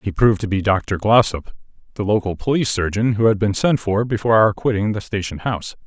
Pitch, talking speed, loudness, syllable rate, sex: 105 Hz, 215 wpm, -19 LUFS, 6.1 syllables/s, male